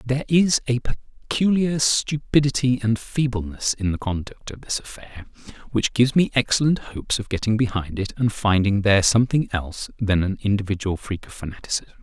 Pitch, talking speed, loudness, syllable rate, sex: 115 Hz, 165 wpm, -22 LUFS, 5.5 syllables/s, male